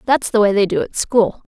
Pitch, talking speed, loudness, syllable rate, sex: 215 Hz, 285 wpm, -16 LUFS, 5.3 syllables/s, female